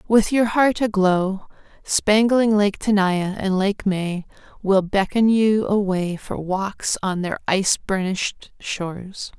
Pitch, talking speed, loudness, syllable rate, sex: 200 Hz, 135 wpm, -20 LUFS, 3.6 syllables/s, female